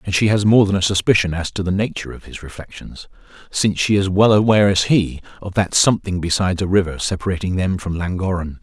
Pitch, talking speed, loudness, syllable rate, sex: 95 Hz, 215 wpm, -17 LUFS, 6.3 syllables/s, male